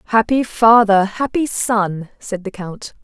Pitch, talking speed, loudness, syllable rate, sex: 215 Hz, 140 wpm, -16 LUFS, 3.8 syllables/s, female